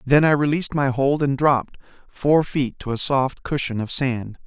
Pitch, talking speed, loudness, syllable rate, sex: 135 Hz, 190 wpm, -21 LUFS, 4.8 syllables/s, male